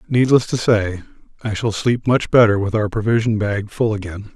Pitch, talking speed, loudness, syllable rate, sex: 110 Hz, 195 wpm, -18 LUFS, 5.1 syllables/s, male